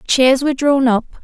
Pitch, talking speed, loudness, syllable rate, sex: 265 Hz, 195 wpm, -14 LUFS, 4.8 syllables/s, female